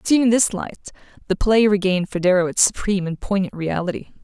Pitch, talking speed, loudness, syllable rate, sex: 195 Hz, 200 wpm, -19 LUFS, 6.3 syllables/s, female